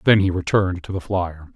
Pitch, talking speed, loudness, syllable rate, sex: 90 Hz, 230 wpm, -21 LUFS, 5.8 syllables/s, male